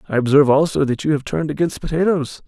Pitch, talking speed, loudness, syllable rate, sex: 150 Hz, 220 wpm, -18 LUFS, 7.1 syllables/s, male